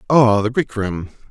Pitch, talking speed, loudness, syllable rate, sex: 115 Hz, 185 wpm, -17 LUFS, 4.3 syllables/s, male